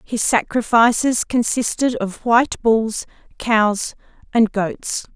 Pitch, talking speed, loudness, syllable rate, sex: 225 Hz, 105 wpm, -18 LUFS, 3.5 syllables/s, female